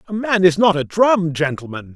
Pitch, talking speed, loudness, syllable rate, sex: 175 Hz, 215 wpm, -16 LUFS, 5.1 syllables/s, male